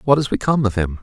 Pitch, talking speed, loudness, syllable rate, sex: 115 Hz, 295 wpm, -18 LUFS, 7.7 syllables/s, male